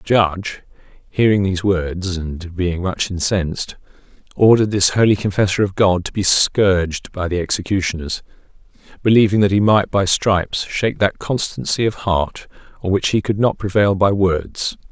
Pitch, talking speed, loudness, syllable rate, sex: 95 Hz, 160 wpm, -17 LUFS, 4.9 syllables/s, male